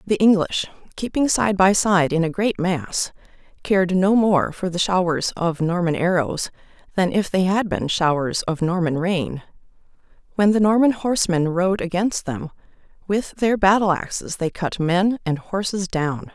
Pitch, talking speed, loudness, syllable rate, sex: 185 Hz, 165 wpm, -20 LUFS, 4.4 syllables/s, female